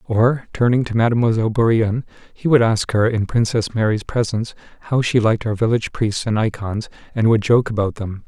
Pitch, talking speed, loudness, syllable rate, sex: 110 Hz, 190 wpm, -18 LUFS, 5.8 syllables/s, male